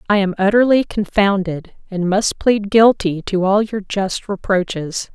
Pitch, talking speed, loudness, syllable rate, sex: 200 Hz, 150 wpm, -17 LUFS, 4.2 syllables/s, female